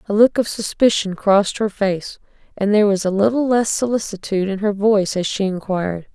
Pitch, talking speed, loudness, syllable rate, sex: 205 Hz, 195 wpm, -18 LUFS, 5.7 syllables/s, female